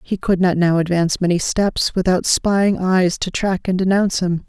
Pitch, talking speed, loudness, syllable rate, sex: 185 Hz, 200 wpm, -17 LUFS, 4.8 syllables/s, female